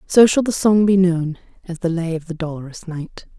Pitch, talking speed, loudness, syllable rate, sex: 175 Hz, 230 wpm, -18 LUFS, 5.2 syllables/s, female